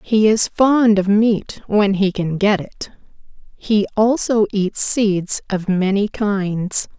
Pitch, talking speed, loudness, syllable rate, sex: 205 Hz, 145 wpm, -17 LUFS, 3.2 syllables/s, female